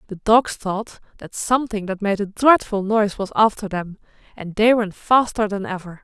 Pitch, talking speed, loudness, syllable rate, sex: 205 Hz, 190 wpm, -19 LUFS, 5.0 syllables/s, female